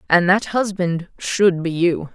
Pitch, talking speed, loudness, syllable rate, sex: 180 Hz, 170 wpm, -19 LUFS, 3.7 syllables/s, female